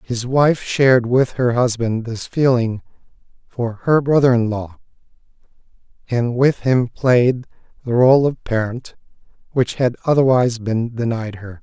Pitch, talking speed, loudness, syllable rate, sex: 120 Hz, 140 wpm, -17 LUFS, 4.2 syllables/s, male